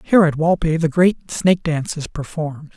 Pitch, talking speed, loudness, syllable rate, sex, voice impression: 160 Hz, 195 wpm, -19 LUFS, 5.7 syllables/s, male, masculine, very adult-like, slightly soft, slightly muffled, sincere, slightly elegant, kind